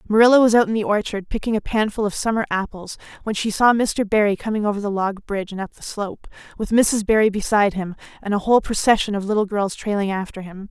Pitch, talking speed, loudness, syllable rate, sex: 210 Hz, 230 wpm, -20 LUFS, 6.4 syllables/s, female